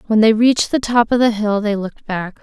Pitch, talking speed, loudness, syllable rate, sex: 220 Hz, 270 wpm, -16 LUFS, 5.8 syllables/s, female